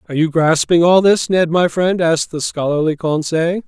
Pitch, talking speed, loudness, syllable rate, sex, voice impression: 165 Hz, 195 wpm, -15 LUFS, 5.2 syllables/s, male, very masculine, very adult-like, middle-aged, thick, tensed, powerful, bright, slightly hard, very clear, fluent, slightly raspy, very cool, intellectual, refreshing, very sincere, calm, mature, very friendly, very reassuring, slightly unique, slightly elegant, wild, sweet, slightly lively, kind